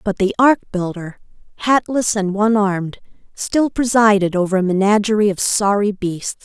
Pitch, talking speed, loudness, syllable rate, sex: 205 Hz, 150 wpm, -17 LUFS, 5.0 syllables/s, female